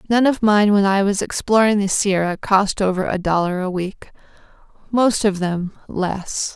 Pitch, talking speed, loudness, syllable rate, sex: 200 Hz, 175 wpm, -18 LUFS, 4.4 syllables/s, female